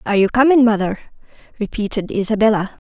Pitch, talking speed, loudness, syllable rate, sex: 215 Hz, 125 wpm, -17 LUFS, 7.0 syllables/s, female